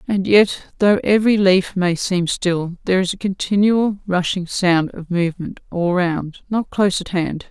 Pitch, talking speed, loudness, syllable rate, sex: 185 Hz, 170 wpm, -18 LUFS, 4.6 syllables/s, female